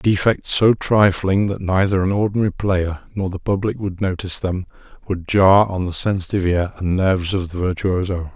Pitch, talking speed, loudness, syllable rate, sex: 95 Hz, 180 wpm, -19 LUFS, 5.2 syllables/s, male